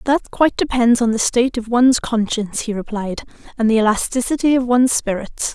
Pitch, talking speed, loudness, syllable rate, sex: 240 Hz, 185 wpm, -17 LUFS, 6.1 syllables/s, female